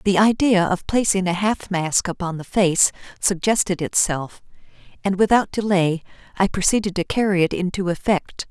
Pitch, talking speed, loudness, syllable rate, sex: 190 Hz, 155 wpm, -20 LUFS, 4.9 syllables/s, female